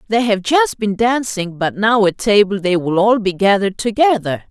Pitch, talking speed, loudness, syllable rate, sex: 210 Hz, 200 wpm, -15 LUFS, 4.9 syllables/s, female